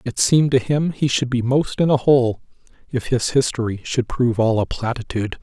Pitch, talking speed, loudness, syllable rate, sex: 125 Hz, 210 wpm, -19 LUFS, 5.4 syllables/s, male